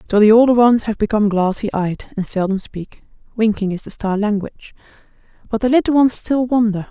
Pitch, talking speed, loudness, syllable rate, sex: 215 Hz, 190 wpm, -17 LUFS, 5.1 syllables/s, female